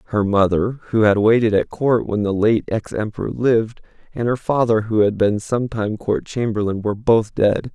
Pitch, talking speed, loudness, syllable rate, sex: 110 Hz, 200 wpm, -19 LUFS, 4.9 syllables/s, male